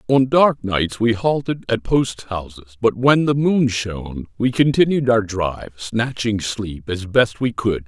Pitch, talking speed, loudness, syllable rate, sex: 115 Hz, 175 wpm, -19 LUFS, 4.0 syllables/s, male